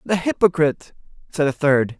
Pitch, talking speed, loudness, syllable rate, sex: 155 Hz, 150 wpm, -19 LUFS, 5.2 syllables/s, male